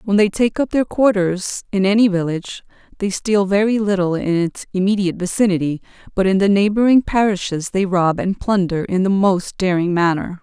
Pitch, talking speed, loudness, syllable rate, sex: 195 Hz, 180 wpm, -17 LUFS, 5.3 syllables/s, female